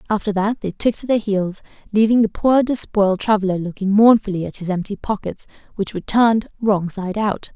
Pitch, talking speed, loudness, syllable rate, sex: 205 Hz, 190 wpm, -19 LUFS, 5.6 syllables/s, female